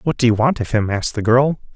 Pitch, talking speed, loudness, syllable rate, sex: 120 Hz, 310 wpm, -17 LUFS, 6.5 syllables/s, male